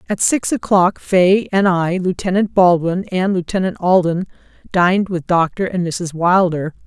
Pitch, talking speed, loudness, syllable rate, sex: 185 Hz, 150 wpm, -16 LUFS, 4.5 syllables/s, female